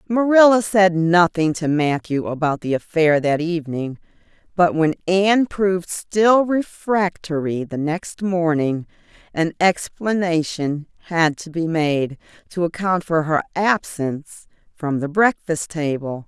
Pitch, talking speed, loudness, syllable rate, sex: 170 Hz, 125 wpm, -19 LUFS, 4.1 syllables/s, female